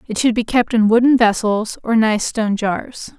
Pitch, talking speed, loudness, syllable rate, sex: 225 Hz, 205 wpm, -16 LUFS, 4.7 syllables/s, female